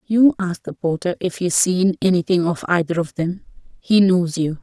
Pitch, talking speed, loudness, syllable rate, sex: 180 Hz, 180 wpm, -19 LUFS, 4.8 syllables/s, female